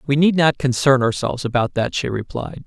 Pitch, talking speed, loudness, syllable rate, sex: 135 Hz, 205 wpm, -19 LUFS, 5.5 syllables/s, male